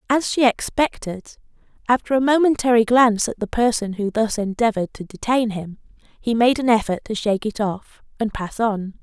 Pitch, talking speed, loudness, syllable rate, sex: 225 Hz, 180 wpm, -20 LUFS, 5.4 syllables/s, female